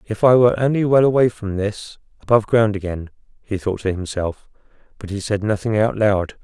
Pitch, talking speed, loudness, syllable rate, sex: 105 Hz, 195 wpm, -19 LUFS, 5.5 syllables/s, male